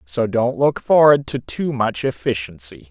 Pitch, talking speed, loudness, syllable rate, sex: 120 Hz, 165 wpm, -18 LUFS, 4.3 syllables/s, male